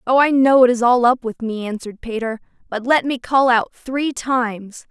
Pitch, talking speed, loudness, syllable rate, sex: 245 Hz, 220 wpm, -18 LUFS, 4.9 syllables/s, female